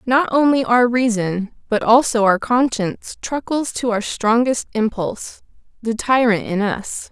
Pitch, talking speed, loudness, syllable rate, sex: 230 Hz, 135 wpm, -18 LUFS, 4.3 syllables/s, female